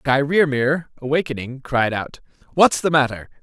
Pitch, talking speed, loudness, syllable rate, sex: 140 Hz, 125 wpm, -20 LUFS, 4.4 syllables/s, male